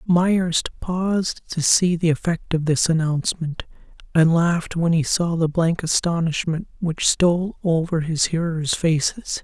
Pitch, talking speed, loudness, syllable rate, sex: 165 Hz, 145 wpm, -21 LUFS, 4.2 syllables/s, male